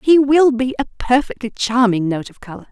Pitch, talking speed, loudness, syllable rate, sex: 240 Hz, 200 wpm, -16 LUFS, 5.5 syllables/s, female